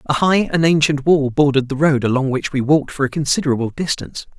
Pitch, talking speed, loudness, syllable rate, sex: 145 Hz, 220 wpm, -17 LUFS, 6.5 syllables/s, male